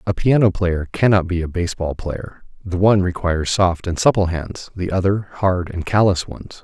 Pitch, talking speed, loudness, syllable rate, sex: 90 Hz, 200 wpm, -19 LUFS, 4.8 syllables/s, male